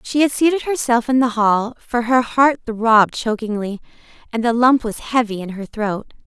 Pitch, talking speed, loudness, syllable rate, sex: 235 Hz, 190 wpm, -18 LUFS, 4.8 syllables/s, female